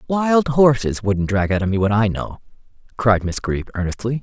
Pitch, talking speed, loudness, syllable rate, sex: 115 Hz, 200 wpm, -19 LUFS, 4.9 syllables/s, male